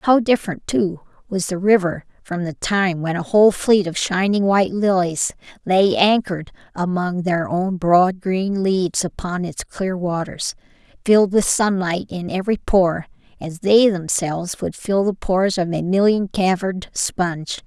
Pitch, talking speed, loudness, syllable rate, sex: 185 Hz, 160 wpm, -19 LUFS, 4.5 syllables/s, female